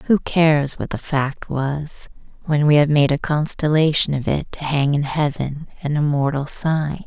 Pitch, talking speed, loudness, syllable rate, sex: 145 Hz, 180 wpm, -19 LUFS, 4.4 syllables/s, female